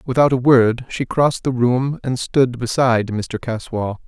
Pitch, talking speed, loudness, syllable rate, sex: 125 Hz, 175 wpm, -18 LUFS, 4.4 syllables/s, male